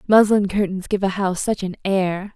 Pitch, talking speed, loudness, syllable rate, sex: 195 Hz, 205 wpm, -20 LUFS, 5.2 syllables/s, female